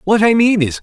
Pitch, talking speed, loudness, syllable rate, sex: 205 Hz, 290 wpm, -13 LUFS, 5.6 syllables/s, male